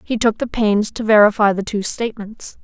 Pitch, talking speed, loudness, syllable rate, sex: 215 Hz, 205 wpm, -17 LUFS, 5.2 syllables/s, female